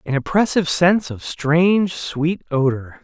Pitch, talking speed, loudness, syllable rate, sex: 160 Hz, 140 wpm, -18 LUFS, 4.6 syllables/s, male